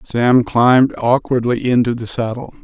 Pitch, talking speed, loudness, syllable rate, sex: 120 Hz, 135 wpm, -15 LUFS, 4.5 syllables/s, male